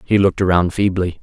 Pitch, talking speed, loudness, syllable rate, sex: 90 Hz, 195 wpm, -16 LUFS, 6.3 syllables/s, male